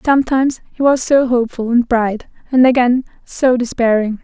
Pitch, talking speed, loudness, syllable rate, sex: 245 Hz, 155 wpm, -15 LUFS, 5.3 syllables/s, female